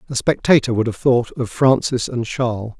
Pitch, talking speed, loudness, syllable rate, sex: 125 Hz, 195 wpm, -18 LUFS, 5.0 syllables/s, male